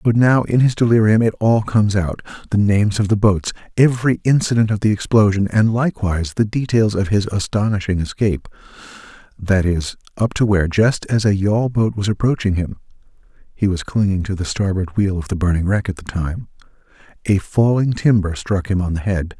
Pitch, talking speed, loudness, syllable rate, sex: 100 Hz, 190 wpm, -18 LUFS, 4.7 syllables/s, male